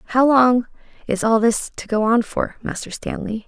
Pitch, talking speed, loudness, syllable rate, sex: 230 Hz, 190 wpm, -19 LUFS, 4.7 syllables/s, female